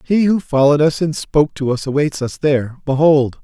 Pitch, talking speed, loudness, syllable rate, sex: 145 Hz, 210 wpm, -16 LUFS, 5.6 syllables/s, male